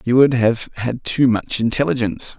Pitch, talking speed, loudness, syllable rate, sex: 120 Hz, 175 wpm, -18 LUFS, 5.0 syllables/s, male